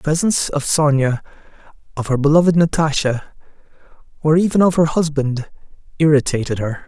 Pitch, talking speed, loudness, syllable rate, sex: 150 Hz, 130 wpm, -17 LUFS, 5.7 syllables/s, male